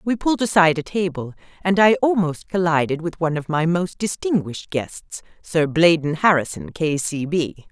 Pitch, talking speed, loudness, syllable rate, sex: 170 Hz, 165 wpm, -20 LUFS, 5.1 syllables/s, female